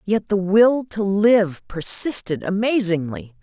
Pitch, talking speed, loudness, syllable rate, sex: 200 Hz, 125 wpm, -19 LUFS, 3.7 syllables/s, female